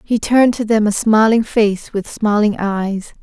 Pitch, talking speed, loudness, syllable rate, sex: 215 Hz, 185 wpm, -15 LUFS, 4.3 syllables/s, female